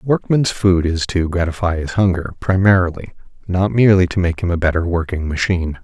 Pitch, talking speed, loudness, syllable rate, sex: 90 Hz, 185 wpm, -17 LUFS, 5.8 syllables/s, male